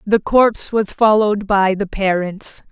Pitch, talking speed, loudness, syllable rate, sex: 205 Hz, 155 wpm, -16 LUFS, 4.4 syllables/s, female